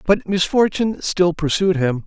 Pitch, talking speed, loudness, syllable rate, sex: 180 Hz, 145 wpm, -18 LUFS, 4.7 syllables/s, male